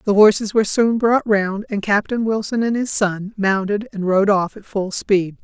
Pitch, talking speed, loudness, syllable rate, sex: 205 Hz, 210 wpm, -18 LUFS, 4.7 syllables/s, female